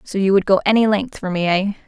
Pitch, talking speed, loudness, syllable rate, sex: 200 Hz, 290 wpm, -17 LUFS, 6.5 syllables/s, female